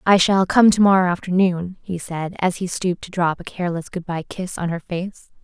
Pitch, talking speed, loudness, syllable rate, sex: 180 Hz, 220 wpm, -20 LUFS, 5.3 syllables/s, female